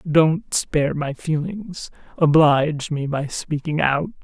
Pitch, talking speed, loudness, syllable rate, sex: 155 Hz, 130 wpm, -20 LUFS, 3.8 syllables/s, female